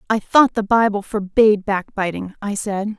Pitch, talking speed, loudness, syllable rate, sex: 205 Hz, 180 wpm, -18 LUFS, 4.8 syllables/s, female